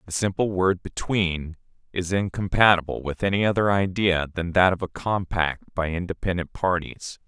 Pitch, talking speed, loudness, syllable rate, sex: 90 Hz, 150 wpm, -24 LUFS, 4.9 syllables/s, male